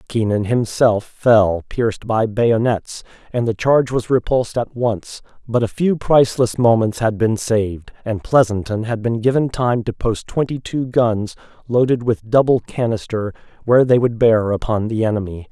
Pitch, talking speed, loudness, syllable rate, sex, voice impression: 115 Hz, 165 wpm, -18 LUFS, 4.7 syllables/s, male, masculine, adult-like, tensed, powerful, slightly bright, slightly muffled, raspy, cool, intellectual, calm, slightly friendly, wild, lively